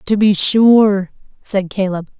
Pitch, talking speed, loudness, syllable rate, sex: 200 Hz, 135 wpm, -14 LUFS, 3.5 syllables/s, female